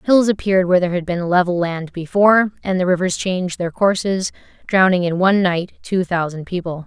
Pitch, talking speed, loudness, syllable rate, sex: 180 Hz, 190 wpm, -18 LUFS, 5.8 syllables/s, female